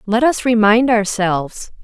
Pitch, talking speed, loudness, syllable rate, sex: 220 Hz, 130 wpm, -15 LUFS, 4.4 syllables/s, female